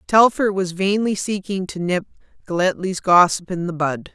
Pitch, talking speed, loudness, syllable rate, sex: 185 Hz, 160 wpm, -19 LUFS, 4.7 syllables/s, female